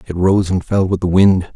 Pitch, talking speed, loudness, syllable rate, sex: 90 Hz, 270 wpm, -15 LUFS, 5.0 syllables/s, male